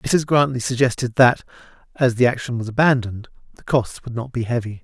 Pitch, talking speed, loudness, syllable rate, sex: 125 Hz, 185 wpm, -19 LUFS, 5.7 syllables/s, male